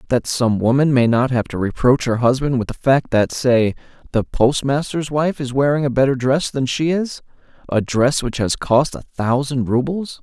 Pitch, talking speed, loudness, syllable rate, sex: 130 Hz, 195 wpm, -18 LUFS, 4.7 syllables/s, male